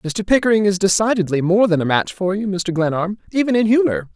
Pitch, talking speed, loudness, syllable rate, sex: 195 Hz, 215 wpm, -17 LUFS, 5.8 syllables/s, male